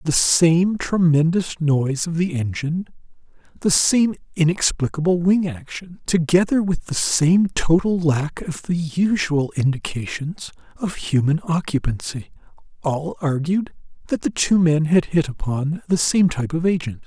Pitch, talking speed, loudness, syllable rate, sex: 160 Hz, 135 wpm, -20 LUFS, 4.3 syllables/s, male